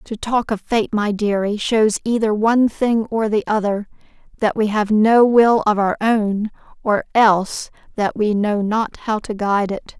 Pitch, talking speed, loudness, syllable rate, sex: 215 Hz, 180 wpm, -18 LUFS, 4.3 syllables/s, female